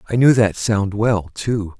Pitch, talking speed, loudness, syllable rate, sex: 105 Hz, 200 wpm, -18 LUFS, 3.9 syllables/s, male